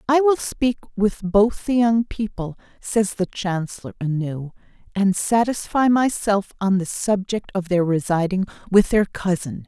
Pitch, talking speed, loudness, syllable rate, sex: 200 Hz, 150 wpm, -21 LUFS, 4.2 syllables/s, female